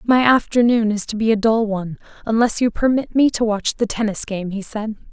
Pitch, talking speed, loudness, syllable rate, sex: 220 Hz, 225 wpm, -18 LUFS, 5.4 syllables/s, female